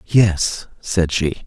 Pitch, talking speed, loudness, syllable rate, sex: 90 Hz, 125 wpm, -18 LUFS, 2.6 syllables/s, male